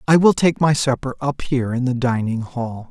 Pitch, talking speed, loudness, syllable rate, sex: 130 Hz, 225 wpm, -19 LUFS, 5.1 syllables/s, male